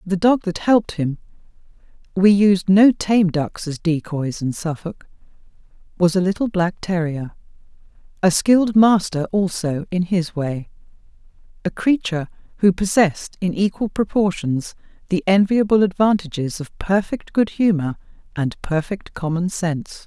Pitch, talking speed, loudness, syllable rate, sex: 185 Hz, 130 wpm, -19 LUFS, 4.1 syllables/s, female